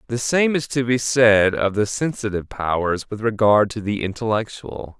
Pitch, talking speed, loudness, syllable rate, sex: 110 Hz, 180 wpm, -20 LUFS, 4.8 syllables/s, male